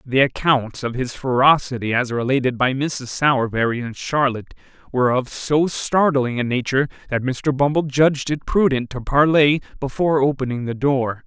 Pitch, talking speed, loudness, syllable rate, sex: 135 Hz, 160 wpm, -19 LUFS, 5.2 syllables/s, male